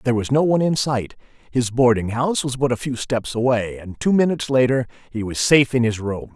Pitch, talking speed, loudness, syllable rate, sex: 125 Hz, 225 wpm, -20 LUFS, 6.1 syllables/s, male